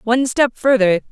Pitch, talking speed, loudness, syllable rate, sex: 240 Hz, 160 wpm, -16 LUFS, 5.6 syllables/s, female